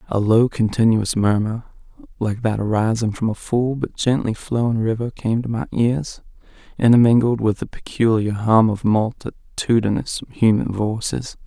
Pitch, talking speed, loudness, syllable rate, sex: 115 Hz, 140 wpm, -19 LUFS, 4.6 syllables/s, male